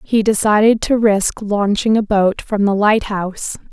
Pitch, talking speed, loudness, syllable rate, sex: 210 Hz, 160 wpm, -15 LUFS, 4.3 syllables/s, female